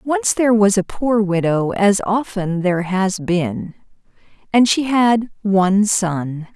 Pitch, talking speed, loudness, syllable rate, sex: 200 Hz, 145 wpm, -17 LUFS, 3.8 syllables/s, female